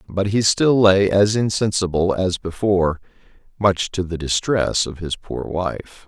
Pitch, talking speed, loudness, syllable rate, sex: 95 Hz, 160 wpm, -19 LUFS, 4.3 syllables/s, male